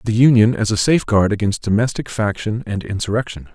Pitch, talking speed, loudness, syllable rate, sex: 110 Hz, 170 wpm, -17 LUFS, 6.0 syllables/s, male